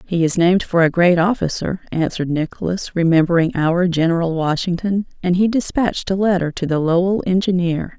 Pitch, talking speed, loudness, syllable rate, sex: 175 Hz, 165 wpm, -18 LUFS, 5.5 syllables/s, female